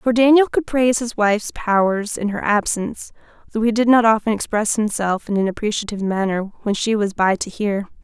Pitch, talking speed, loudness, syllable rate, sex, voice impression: 215 Hz, 200 wpm, -19 LUFS, 5.5 syllables/s, female, very feminine, middle-aged, very thin, tensed, slightly powerful, bright, hard, clear, fluent, slightly raspy, slightly cool, intellectual, very refreshing, slightly sincere, slightly calm, slightly friendly, slightly unique, elegant, slightly wild, sweet, very lively, slightly strict, slightly intense, light